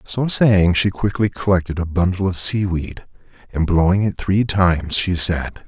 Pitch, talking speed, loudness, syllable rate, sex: 95 Hz, 180 wpm, -18 LUFS, 4.5 syllables/s, male